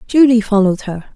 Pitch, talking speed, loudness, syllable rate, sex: 220 Hz, 155 wpm, -13 LUFS, 6.1 syllables/s, female